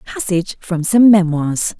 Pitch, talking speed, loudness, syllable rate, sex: 185 Hz, 135 wpm, -15 LUFS, 4.1 syllables/s, female